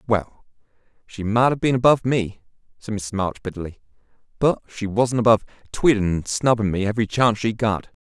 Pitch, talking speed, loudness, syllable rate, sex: 110 Hz, 170 wpm, -21 LUFS, 5.8 syllables/s, male